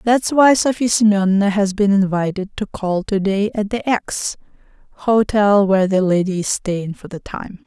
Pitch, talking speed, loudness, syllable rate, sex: 205 Hz, 180 wpm, -17 LUFS, 4.7 syllables/s, female